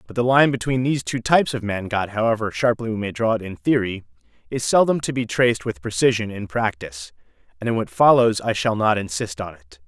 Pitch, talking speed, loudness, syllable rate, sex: 110 Hz, 225 wpm, -21 LUFS, 5.9 syllables/s, male